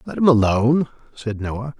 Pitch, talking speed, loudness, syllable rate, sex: 120 Hz, 165 wpm, -19 LUFS, 5.0 syllables/s, male